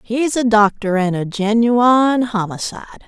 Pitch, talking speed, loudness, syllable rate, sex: 220 Hz, 135 wpm, -16 LUFS, 4.7 syllables/s, female